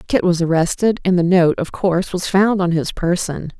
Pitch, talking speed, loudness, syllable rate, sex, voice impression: 180 Hz, 215 wpm, -17 LUFS, 5.0 syllables/s, female, feminine, adult-like, bright, soft, clear, fluent, intellectual, slightly calm, friendly, reassuring, elegant, kind, slightly modest